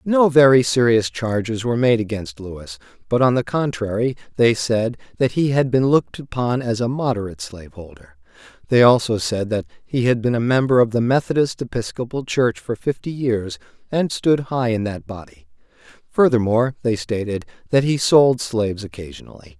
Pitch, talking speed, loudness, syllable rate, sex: 115 Hz, 170 wpm, -19 LUFS, 5.3 syllables/s, male